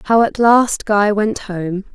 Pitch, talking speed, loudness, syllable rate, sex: 210 Hz, 185 wpm, -15 LUFS, 3.5 syllables/s, female